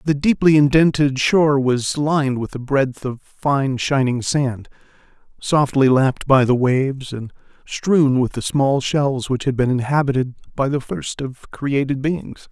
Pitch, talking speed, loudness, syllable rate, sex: 135 Hz, 165 wpm, -18 LUFS, 4.3 syllables/s, male